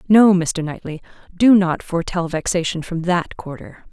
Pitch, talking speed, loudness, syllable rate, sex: 175 Hz, 155 wpm, -18 LUFS, 4.7 syllables/s, female